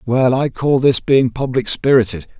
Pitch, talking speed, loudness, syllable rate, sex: 125 Hz, 175 wpm, -15 LUFS, 4.6 syllables/s, male